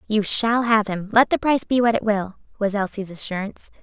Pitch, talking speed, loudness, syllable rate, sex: 215 Hz, 220 wpm, -21 LUFS, 5.7 syllables/s, female